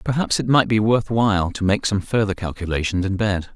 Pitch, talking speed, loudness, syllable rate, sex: 105 Hz, 220 wpm, -20 LUFS, 5.6 syllables/s, male